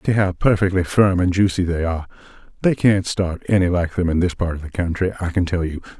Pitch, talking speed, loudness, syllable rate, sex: 90 Hz, 230 wpm, -19 LUFS, 5.9 syllables/s, male